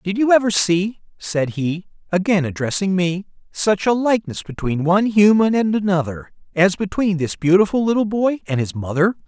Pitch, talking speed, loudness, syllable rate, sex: 190 Hz, 170 wpm, -18 LUFS, 5.2 syllables/s, male